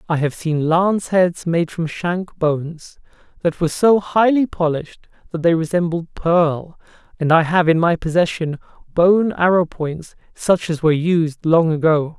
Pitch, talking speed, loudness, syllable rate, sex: 170 Hz, 165 wpm, -18 LUFS, 4.4 syllables/s, male